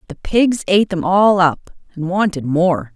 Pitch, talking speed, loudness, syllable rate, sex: 185 Hz, 185 wpm, -16 LUFS, 4.4 syllables/s, female